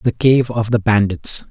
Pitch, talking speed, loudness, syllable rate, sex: 110 Hz, 200 wpm, -16 LUFS, 4.3 syllables/s, male